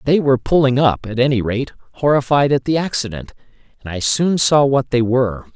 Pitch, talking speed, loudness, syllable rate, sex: 130 Hz, 195 wpm, -16 LUFS, 5.6 syllables/s, male